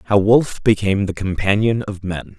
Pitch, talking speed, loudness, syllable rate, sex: 100 Hz, 175 wpm, -18 LUFS, 5.0 syllables/s, male